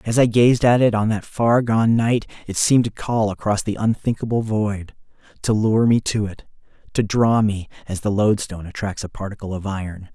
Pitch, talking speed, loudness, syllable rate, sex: 105 Hz, 200 wpm, -20 LUFS, 5.3 syllables/s, male